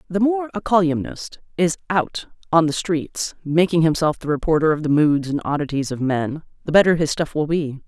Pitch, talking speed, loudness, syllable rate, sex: 160 Hz, 200 wpm, -20 LUFS, 5.2 syllables/s, female